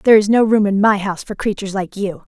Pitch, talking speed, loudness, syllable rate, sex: 205 Hz, 280 wpm, -17 LUFS, 6.7 syllables/s, female